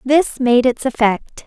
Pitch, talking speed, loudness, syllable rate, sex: 250 Hz, 165 wpm, -16 LUFS, 3.8 syllables/s, female